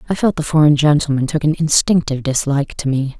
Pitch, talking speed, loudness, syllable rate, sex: 150 Hz, 205 wpm, -16 LUFS, 6.4 syllables/s, female